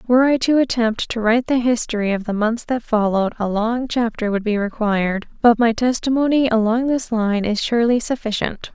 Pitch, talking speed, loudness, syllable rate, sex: 230 Hz, 190 wpm, -19 LUFS, 5.5 syllables/s, female